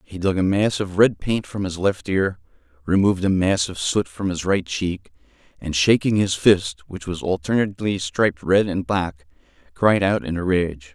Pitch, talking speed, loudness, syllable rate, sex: 90 Hz, 195 wpm, -21 LUFS, 4.7 syllables/s, male